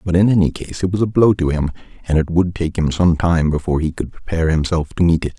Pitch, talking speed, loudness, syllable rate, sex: 85 Hz, 280 wpm, -17 LUFS, 6.3 syllables/s, male